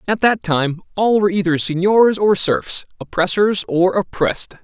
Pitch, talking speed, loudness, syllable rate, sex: 190 Hz, 155 wpm, -17 LUFS, 4.7 syllables/s, male